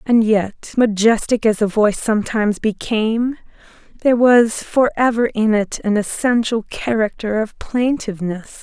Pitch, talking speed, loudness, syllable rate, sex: 220 Hz, 130 wpm, -17 LUFS, 4.7 syllables/s, female